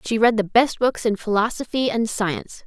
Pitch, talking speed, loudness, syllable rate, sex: 220 Hz, 200 wpm, -21 LUFS, 5.1 syllables/s, female